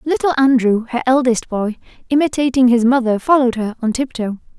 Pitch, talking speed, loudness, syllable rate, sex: 250 Hz, 155 wpm, -16 LUFS, 5.6 syllables/s, female